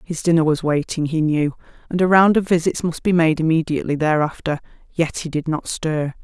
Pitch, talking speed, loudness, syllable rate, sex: 160 Hz, 200 wpm, -19 LUFS, 5.5 syllables/s, female